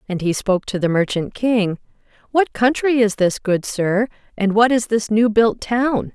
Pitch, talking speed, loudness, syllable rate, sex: 220 Hz, 195 wpm, -18 LUFS, 4.5 syllables/s, female